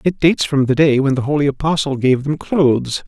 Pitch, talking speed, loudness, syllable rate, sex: 140 Hz, 235 wpm, -16 LUFS, 5.7 syllables/s, male